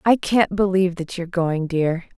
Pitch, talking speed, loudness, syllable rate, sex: 180 Hz, 220 wpm, -21 LUFS, 5.6 syllables/s, female